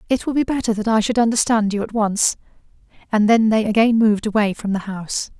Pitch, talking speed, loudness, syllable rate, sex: 215 Hz, 210 wpm, -18 LUFS, 6.2 syllables/s, female